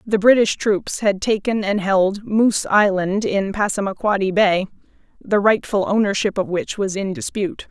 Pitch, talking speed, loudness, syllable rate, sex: 200 Hz, 155 wpm, -19 LUFS, 4.7 syllables/s, female